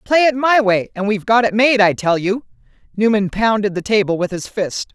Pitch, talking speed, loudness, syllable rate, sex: 210 Hz, 230 wpm, -16 LUFS, 5.4 syllables/s, female